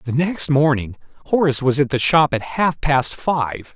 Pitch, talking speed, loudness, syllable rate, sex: 140 Hz, 190 wpm, -18 LUFS, 4.5 syllables/s, male